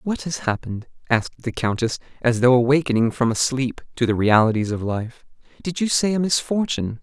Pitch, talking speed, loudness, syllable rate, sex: 130 Hz, 190 wpm, -21 LUFS, 5.6 syllables/s, male